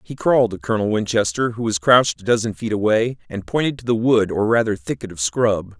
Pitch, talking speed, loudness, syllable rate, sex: 110 Hz, 230 wpm, -19 LUFS, 5.9 syllables/s, male